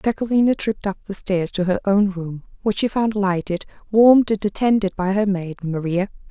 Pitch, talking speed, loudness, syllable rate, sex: 200 Hz, 190 wpm, -20 LUFS, 5.3 syllables/s, female